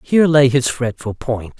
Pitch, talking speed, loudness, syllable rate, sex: 130 Hz, 190 wpm, -16 LUFS, 4.8 syllables/s, male